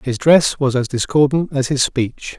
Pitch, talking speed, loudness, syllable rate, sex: 140 Hz, 200 wpm, -16 LUFS, 4.4 syllables/s, male